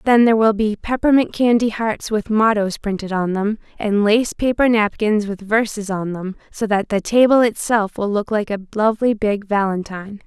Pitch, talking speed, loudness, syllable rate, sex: 215 Hz, 185 wpm, -18 LUFS, 4.9 syllables/s, female